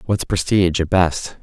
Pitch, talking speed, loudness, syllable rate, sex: 90 Hz, 170 wpm, -18 LUFS, 4.7 syllables/s, male